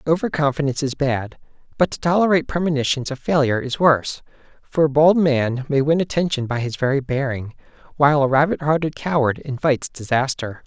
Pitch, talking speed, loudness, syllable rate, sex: 145 Hz, 170 wpm, -20 LUFS, 5.9 syllables/s, male